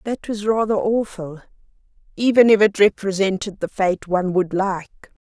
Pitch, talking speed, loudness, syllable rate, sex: 200 Hz, 145 wpm, -19 LUFS, 4.7 syllables/s, female